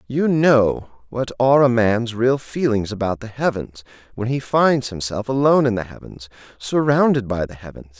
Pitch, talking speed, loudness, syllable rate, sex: 120 Hz, 175 wpm, -19 LUFS, 4.8 syllables/s, male